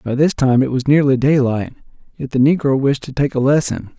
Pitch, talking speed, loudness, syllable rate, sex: 135 Hz, 225 wpm, -16 LUFS, 5.6 syllables/s, male